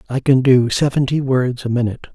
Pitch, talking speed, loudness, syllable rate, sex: 130 Hz, 195 wpm, -16 LUFS, 5.8 syllables/s, male